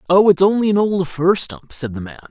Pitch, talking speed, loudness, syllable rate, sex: 175 Hz, 260 wpm, -17 LUFS, 5.5 syllables/s, male